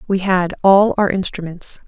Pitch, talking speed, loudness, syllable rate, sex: 190 Hz, 160 wpm, -16 LUFS, 4.4 syllables/s, female